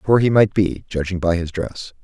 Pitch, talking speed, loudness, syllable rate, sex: 95 Hz, 235 wpm, -19 LUFS, 4.9 syllables/s, male